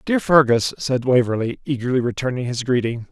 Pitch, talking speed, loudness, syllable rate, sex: 125 Hz, 155 wpm, -19 LUFS, 5.5 syllables/s, male